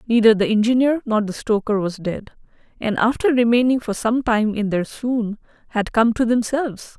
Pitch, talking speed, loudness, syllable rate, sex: 225 Hz, 180 wpm, -19 LUFS, 5.1 syllables/s, female